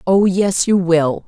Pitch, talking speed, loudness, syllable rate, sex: 180 Hz, 190 wpm, -15 LUFS, 3.5 syllables/s, female